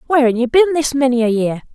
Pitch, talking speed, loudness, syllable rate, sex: 260 Hz, 275 wpm, -15 LUFS, 7.4 syllables/s, female